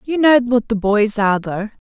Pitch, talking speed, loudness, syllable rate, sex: 225 Hz, 225 wpm, -16 LUFS, 5.0 syllables/s, female